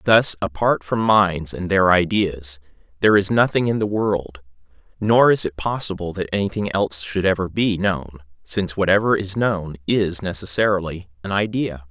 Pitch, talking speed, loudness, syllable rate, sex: 95 Hz, 160 wpm, -20 LUFS, 4.8 syllables/s, male